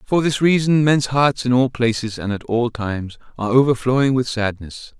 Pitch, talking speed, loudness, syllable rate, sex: 125 Hz, 190 wpm, -18 LUFS, 5.1 syllables/s, male